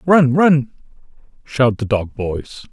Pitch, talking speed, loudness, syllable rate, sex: 135 Hz, 130 wpm, -16 LUFS, 3.3 syllables/s, male